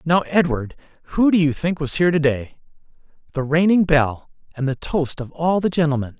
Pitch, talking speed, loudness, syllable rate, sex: 155 Hz, 185 wpm, -19 LUFS, 5.5 syllables/s, male